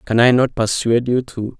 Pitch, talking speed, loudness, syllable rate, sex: 120 Hz, 225 wpm, -16 LUFS, 5.4 syllables/s, male